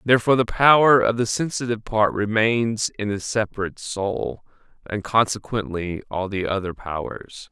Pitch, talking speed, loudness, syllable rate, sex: 105 Hz, 145 wpm, -21 LUFS, 5.0 syllables/s, male